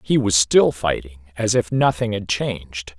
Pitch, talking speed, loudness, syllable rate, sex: 100 Hz, 180 wpm, -19 LUFS, 4.6 syllables/s, male